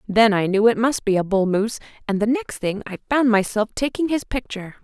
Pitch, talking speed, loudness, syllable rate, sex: 225 Hz, 235 wpm, -20 LUFS, 5.8 syllables/s, female